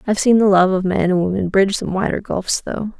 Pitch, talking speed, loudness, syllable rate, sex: 195 Hz, 260 wpm, -17 LUFS, 6.0 syllables/s, female